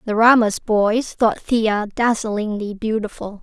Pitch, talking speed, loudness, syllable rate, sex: 220 Hz, 120 wpm, -19 LUFS, 3.7 syllables/s, female